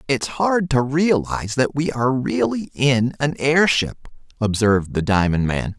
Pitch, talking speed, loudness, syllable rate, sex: 130 Hz, 155 wpm, -19 LUFS, 4.4 syllables/s, male